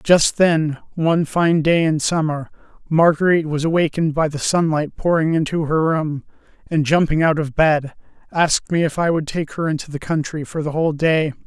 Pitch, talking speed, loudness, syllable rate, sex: 160 Hz, 190 wpm, -18 LUFS, 5.2 syllables/s, male